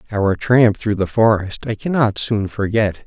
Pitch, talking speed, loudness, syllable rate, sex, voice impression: 110 Hz, 175 wpm, -17 LUFS, 4.4 syllables/s, male, masculine, slightly middle-aged, slightly thick, slightly muffled, slightly calm, elegant, kind